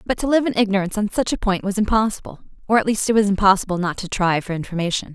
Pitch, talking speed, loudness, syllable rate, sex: 200 Hz, 255 wpm, -20 LUFS, 7.2 syllables/s, female